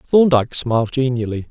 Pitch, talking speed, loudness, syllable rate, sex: 130 Hz, 120 wpm, -17 LUFS, 5.4 syllables/s, male